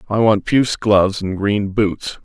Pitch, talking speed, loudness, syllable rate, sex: 105 Hz, 190 wpm, -17 LUFS, 3.9 syllables/s, male